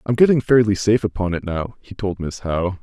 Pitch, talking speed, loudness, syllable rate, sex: 100 Hz, 235 wpm, -19 LUFS, 6.0 syllables/s, male